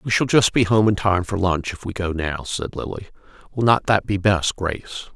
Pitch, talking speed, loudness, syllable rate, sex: 95 Hz, 245 wpm, -20 LUFS, 5.1 syllables/s, male